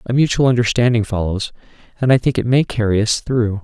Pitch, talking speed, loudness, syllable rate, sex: 115 Hz, 200 wpm, -17 LUFS, 5.9 syllables/s, male